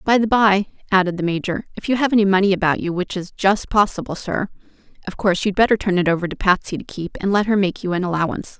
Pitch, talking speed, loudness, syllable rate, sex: 190 Hz, 250 wpm, -19 LUFS, 6.6 syllables/s, female